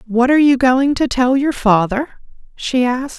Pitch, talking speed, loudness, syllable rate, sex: 255 Hz, 190 wpm, -15 LUFS, 4.8 syllables/s, female